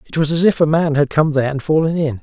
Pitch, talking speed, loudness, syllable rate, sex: 150 Hz, 325 wpm, -16 LUFS, 6.6 syllables/s, male